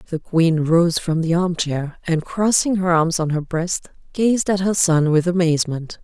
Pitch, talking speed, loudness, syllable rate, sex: 170 Hz, 190 wpm, -19 LUFS, 4.4 syllables/s, female